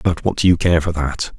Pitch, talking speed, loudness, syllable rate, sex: 80 Hz, 305 wpm, -17 LUFS, 5.5 syllables/s, male